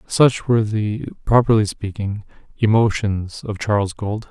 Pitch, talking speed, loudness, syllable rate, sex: 105 Hz, 100 wpm, -19 LUFS, 4.4 syllables/s, male